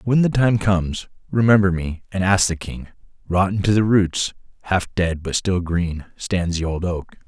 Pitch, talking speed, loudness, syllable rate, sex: 95 Hz, 190 wpm, -20 LUFS, 4.4 syllables/s, male